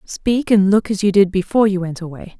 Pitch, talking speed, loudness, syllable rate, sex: 195 Hz, 250 wpm, -16 LUFS, 5.7 syllables/s, female